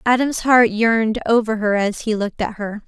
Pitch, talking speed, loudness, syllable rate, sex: 220 Hz, 210 wpm, -18 LUFS, 5.2 syllables/s, female